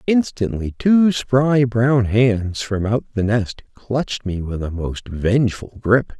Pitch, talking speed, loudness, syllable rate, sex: 115 Hz, 155 wpm, -19 LUFS, 3.7 syllables/s, male